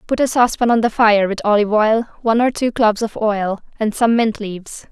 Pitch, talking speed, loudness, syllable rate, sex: 220 Hz, 230 wpm, -16 LUFS, 5.9 syllables/s, female